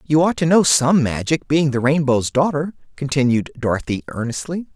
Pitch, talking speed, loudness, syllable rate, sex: 140 Hz, 165 wpm, -18 LUFS, 5.1 syllables/s, male